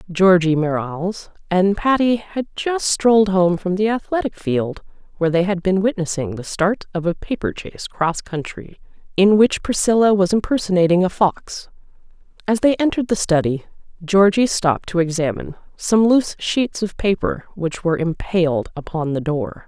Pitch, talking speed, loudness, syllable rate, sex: 190 Hz, 160 wpm, -18 LUFS, 5.0 syllables/s, female